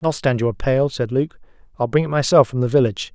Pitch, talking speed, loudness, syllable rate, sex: 130 Hz, 265 wpm, -19 LUFS, 6.4 syllables/s, male